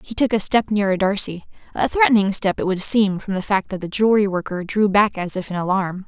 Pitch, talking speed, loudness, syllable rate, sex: 200 Hz, 235 wpm, -19 LUFS, 5.8 syllables/s, female